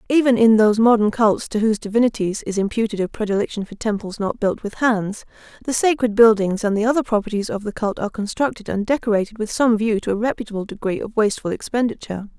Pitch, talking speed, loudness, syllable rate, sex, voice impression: 215 Hz, 205 wpm, -20 LUFS, 6.5 syllables/s, female, feminine, slightly adult-like, fluent, slightly cute, slightly intellectual, slightly elegant